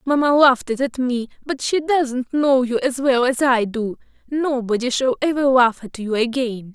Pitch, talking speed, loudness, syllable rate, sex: 255 Hz, 185 wpm, -19 LUFS, 4.4 syllables/s, female